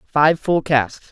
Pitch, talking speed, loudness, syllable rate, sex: 145 Hz, 160 wpm, -17 LUFS, 3.0 syllables/s, male